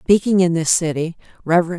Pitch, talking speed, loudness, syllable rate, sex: 175 Hz, 170 wpm, -17 LUFS, 5.0 syllables/s, female